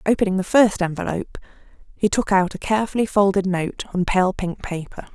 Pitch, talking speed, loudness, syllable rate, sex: 190 Hz, 175 wpm, -21 LUFS, 5.8 syllables/s, female